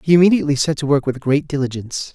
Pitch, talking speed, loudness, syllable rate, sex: 145 Hz, 225 wpm, -18 LUFS, 7.3 syllables/s, male